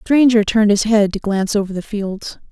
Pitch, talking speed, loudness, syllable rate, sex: 210 Hz, 240 wpm, -16 LUFS, 5.9 syllables/s, female